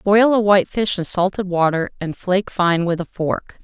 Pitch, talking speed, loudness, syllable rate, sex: 185 Hz, 200 wpm, -18 LUFS, 5.0 syllables/s, female